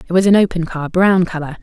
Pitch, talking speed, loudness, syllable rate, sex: 175 Hz, 260 wpm, -15 LUFS, 6.0 syllables/s, female